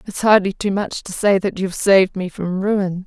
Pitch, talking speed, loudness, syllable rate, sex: 195 Hz, 235 wpm, -18 LUFS, 5.1 syllables/s, female